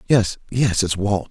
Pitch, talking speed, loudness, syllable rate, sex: 100 Hz, 185 wpm, -20 LUFS, 4.1 syllables/s, male